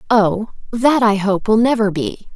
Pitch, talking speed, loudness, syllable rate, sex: 215 Hz, 180 wpm, -16 LUFS, 4.6 syllables/s, female